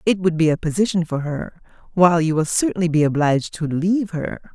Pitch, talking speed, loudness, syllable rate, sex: 170 Hz, 210 wpm, -20 LUFS, 6.0 syllables/s, female